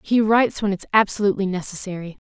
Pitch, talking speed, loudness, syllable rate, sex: 200 Hz, 185 wpm, -20 LUFS, 7.5 syllables/s, female